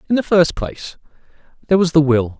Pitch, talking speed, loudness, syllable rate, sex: 165 Hz, 200 wpm, -16 LUFS, 6.7 syllables/s, male